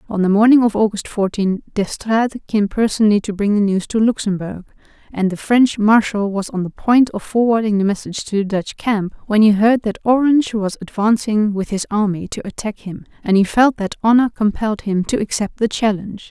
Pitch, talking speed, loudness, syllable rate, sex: 210 Hz, 200 wpm, -17 LUFS, 5.5 syllables/s, female